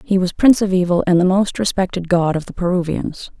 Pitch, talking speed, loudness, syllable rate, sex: 185 Hz, 230 wpm, -17 LUFS, 5.9 syllables/s, female